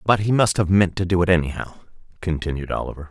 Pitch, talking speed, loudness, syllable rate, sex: 90 Hz, 215 wpm, -21 LUFS, 6.5 syllables/s, male